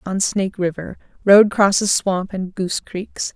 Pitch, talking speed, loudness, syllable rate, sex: 195 Hz, 145 wpm, -18 LUFS, 4.4 syllables/s, female